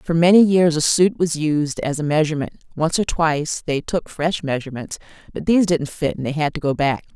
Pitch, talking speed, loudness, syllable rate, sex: 160 Hz, 225 wpm, -19 LUFS, 5.7 syllables/s, female